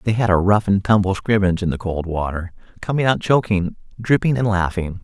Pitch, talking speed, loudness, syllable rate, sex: 100 Hz, 205 wpm, -19 LUFS, 5.7 syllables/s, male